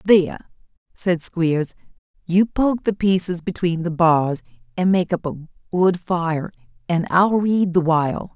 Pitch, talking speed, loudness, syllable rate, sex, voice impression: 175 Hz, 150 wpm, -20 LUFS, 4.1 syllables/s, female, feminine, very adult-like, slightly clear, slightly intellectual, elegant